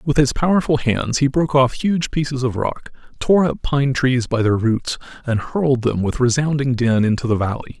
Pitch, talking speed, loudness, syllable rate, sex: 130 Hz, 210 wpm, -18 LUFS, 5.0 syllables/s, male